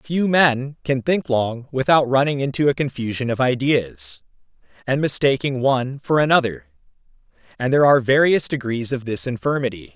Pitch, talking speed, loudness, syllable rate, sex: 130 Hz, 150 wpm, -19 LUFS, 5.2 syllables/s, male